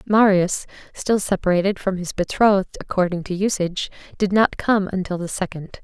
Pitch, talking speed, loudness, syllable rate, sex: 190 Hz, 155 wpm, -21 LUFS, 5.2 syllables/s, female